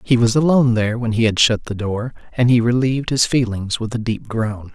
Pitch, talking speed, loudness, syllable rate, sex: 115 Hz, 230 wpm, -18 LUFS, 5.6 syllables/s, male